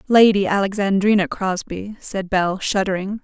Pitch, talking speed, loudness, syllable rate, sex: 195 Hz, 110 wpm, -19 LUFS, 4.6 syllables/s, female